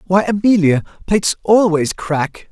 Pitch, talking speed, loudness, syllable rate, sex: 185 Hz, 120 wpm, -15 LUFS, 4.0 syllables/s, male